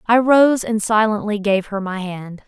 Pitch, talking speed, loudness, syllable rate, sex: 210 Hz, 195 wpm, -17 LUFS, 4.3 syllables/s, female